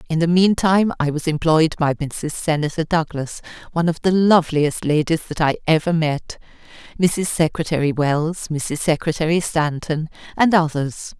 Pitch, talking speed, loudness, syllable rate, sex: 160 Hz, 150 wpm, -19 LUFS, 4.7 syllables/s, female